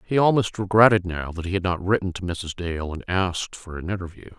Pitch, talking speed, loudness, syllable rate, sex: 95 Hz, 235 wpm, -23 LUFS, 5.7 syllables/s, male